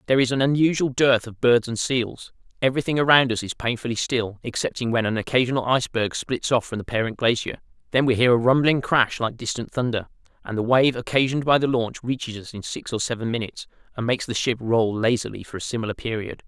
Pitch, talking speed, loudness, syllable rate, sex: 120 Hz, 215 wpm, -22 LUFS, 6.2 syllables/s, male